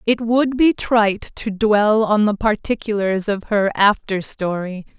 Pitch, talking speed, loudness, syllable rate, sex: 210 Hz, 155 wpm, -18 LUFS, 4.1 syllables/s, female